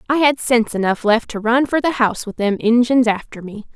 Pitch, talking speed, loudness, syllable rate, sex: 235 Hz, 240 wpm, -17 LUFS, 5.7 syllables/s, female